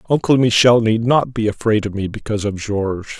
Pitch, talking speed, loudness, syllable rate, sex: 110 Hz, 205 wpm, -17 LUFS, 5.7 syllables/s, male